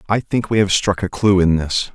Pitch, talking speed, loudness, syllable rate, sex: 95 Hz, 275 wpm, -17 LUFS, 5.1 syllables/s, male